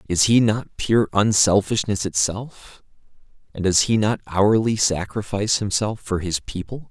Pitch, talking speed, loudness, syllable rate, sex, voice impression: 105 Hz, 140 wpm, -20 LUFS, 4.4 syllables/s, male, masculine, adult-like, thick, tensed, powerful, slightly soft, slightly muffled, cool, intellectual, calm, friendly, wild, kind, modest